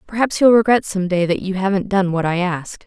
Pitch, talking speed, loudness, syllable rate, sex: 190 Hz, 250 wpm, -17 LUFS, 5.9 syllables/s, female